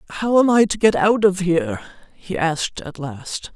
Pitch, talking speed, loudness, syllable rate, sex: 185 Hz, 200 wpm, -19 LUFS, 5.0 syllables/s, male